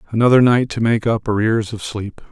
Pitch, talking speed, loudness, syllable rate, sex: 110 Hz, 205 wpm, -17 LUFS, 5.4 syllables/s, male